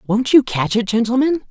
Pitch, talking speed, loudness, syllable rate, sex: 240 Hz, 200 wpm, -16 LUFS, 5.2 syllables/s, female